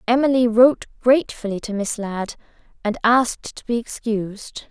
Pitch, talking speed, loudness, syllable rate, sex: 230 Hz, 140 wpm, -20 LUFS, 5.1 syllables/s, female